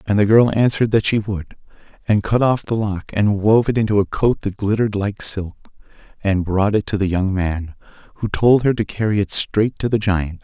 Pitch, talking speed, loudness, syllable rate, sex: 105 Hz, 225 wpm, -18 LUFS, 5.1 syllables/s, male